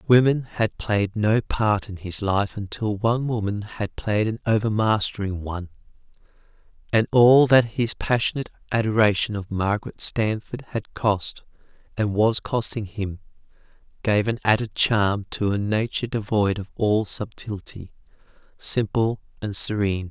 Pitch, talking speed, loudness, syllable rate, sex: 105 Hz, 135 wpm, -23 LUFS, 4.5 syllables/s, male